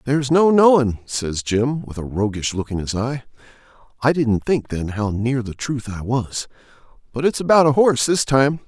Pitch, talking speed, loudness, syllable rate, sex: 125 Hz, 200 wpm, -19 LUFS, 3.9 syllables/s, male